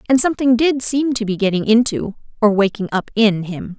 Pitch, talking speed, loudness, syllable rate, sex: 225 Hz, 205 wpm, -17 LUFS, 5.5 syllables/s, female